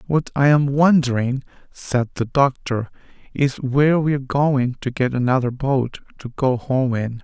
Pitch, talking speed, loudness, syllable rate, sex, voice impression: 130 Hz, 165 wpm, -19 LUFS, 4.5 syllables/s, male, very masculine, very adult-like, middle-aged, thick, slightly tensed, powerful, bright, soft, slightly muffled, fluent, slightly raspy, cool, intellectual, very sincere, very calm, mature, slightly friendly, reassuring, unique, slightly elegant, wild, slightly sweet, lively, kind, modest